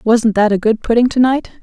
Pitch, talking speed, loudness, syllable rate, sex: 230 Hz, 260 wpm, -14 LUFS, 5.6 syllables/s, female